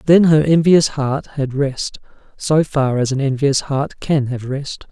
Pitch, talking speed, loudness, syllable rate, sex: 140 Hz, 185 wpm, -17 LUFS, 3.9 syllables/s, male